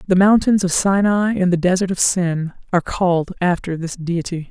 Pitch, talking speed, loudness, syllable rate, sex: 180 Hz, 185 wpm, -18 LUFS, 5.2 syllables/s, female